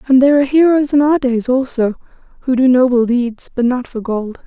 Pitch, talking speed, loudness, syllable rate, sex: 255 Hz, 215 wpm, -14 LUFS, 5.6 syllables/s, female